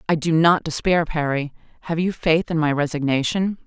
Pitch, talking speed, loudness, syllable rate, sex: 160 Hz, 180 wpm, -20 LUFS, 5.2 syllables/s, female